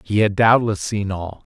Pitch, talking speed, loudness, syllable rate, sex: 105 Hz, 195 wpm, -19 LUFS, 4.4 syllables/s, male